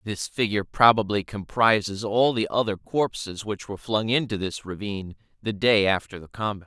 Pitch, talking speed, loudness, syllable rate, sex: 105 Hz, 170 wpm, -24 LUFS, 5.2 syllables/s, male